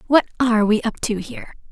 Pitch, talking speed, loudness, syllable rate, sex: 225 Hz, 210 wpm, -19 LUFS, 6.5 syllables/s, female